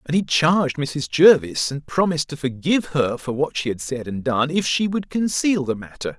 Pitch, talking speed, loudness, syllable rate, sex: 150 Hz, 225 wpm, -20 LUFS, 5.1 syllables/s, male